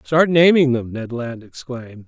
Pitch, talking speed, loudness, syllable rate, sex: 130 Hz, 175 wpm, -17 LUFS, 4.6 syllables/s, male